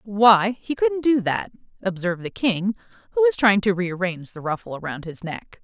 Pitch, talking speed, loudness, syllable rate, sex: 205 Hz, 190 wpm, -22 LUFS, 5.0 syllables/s, female